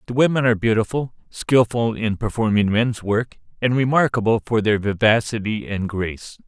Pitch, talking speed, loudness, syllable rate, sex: 110 Hz, 150 wpm, -20 LUFS, 5.1 syllables/s, male